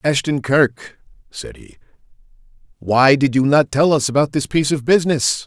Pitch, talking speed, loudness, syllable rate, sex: 140 Hz, 165 wpm, -16 LUFS, 4.9 syllables/s, male